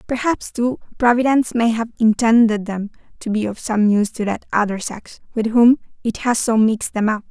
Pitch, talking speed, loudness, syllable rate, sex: 225 Hz, 195 wpm, -18 LUFS, 5.4 syllables/s, female